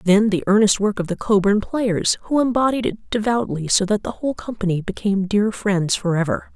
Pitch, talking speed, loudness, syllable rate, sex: 205 Hz, 190 wpm, -20 LUFS, 5.4 syllables/s, female